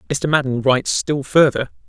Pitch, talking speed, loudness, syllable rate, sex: 140 Hz, 160 wpm, -17 LUFS, 5.2 syllables/s, male